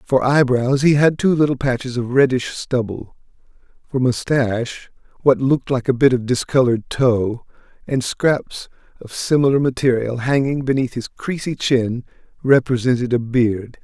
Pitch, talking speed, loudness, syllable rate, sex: 130 Hz, 145 wpm, -18 LUFS, 4.7 syllables/s, male